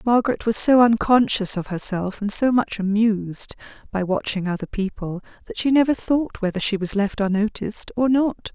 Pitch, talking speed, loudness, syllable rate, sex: 215 Hz, 175 wpm, -21 LUFS, 5.2 syllables/s, female